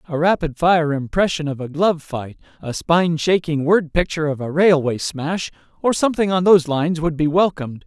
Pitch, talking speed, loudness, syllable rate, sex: 160 Hz, 190 wpm, -19 LUFS, 5.6 syllables/s, male